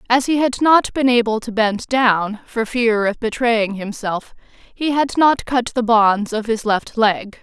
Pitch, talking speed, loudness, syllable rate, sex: 230 Hz, 195 wpm, -17 LUFS, 4.0 syllables/s, female